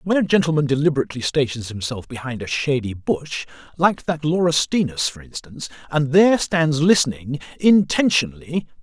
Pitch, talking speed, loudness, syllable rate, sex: 145 Hz, 135 wpm, -20 LUFS, 5.4 syllables/s, male